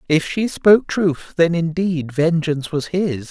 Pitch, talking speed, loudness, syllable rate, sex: 165 Hz, 165 wpm, -18 LUFS, 4.2 syllables/s, male